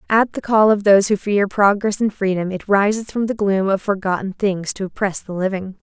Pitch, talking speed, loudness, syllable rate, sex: 200 Hz, 225 wpm, -18 LUFS, 5.4 syllables/s, female